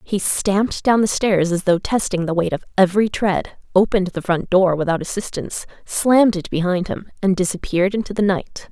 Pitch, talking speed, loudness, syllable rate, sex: 190 Hz, 195 wpm, -19 LUFS, 5.5 syllables/s, female